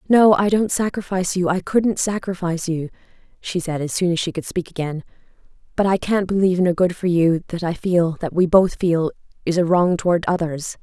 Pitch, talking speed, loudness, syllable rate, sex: 180 Hz, 210 wpm, -20 LUFS, 5.6 syllables/s, female